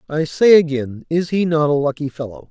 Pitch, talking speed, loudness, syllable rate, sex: 150 Hz, 215 wpm, -17 LUFS, 5.3 syllables/s, male